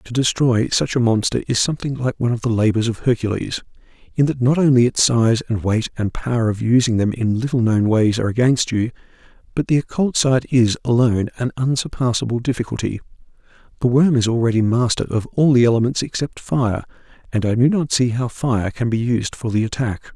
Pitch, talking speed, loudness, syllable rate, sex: 120 Hz, 195 wpm, -18 LUFS, 5.8 syllables/s, male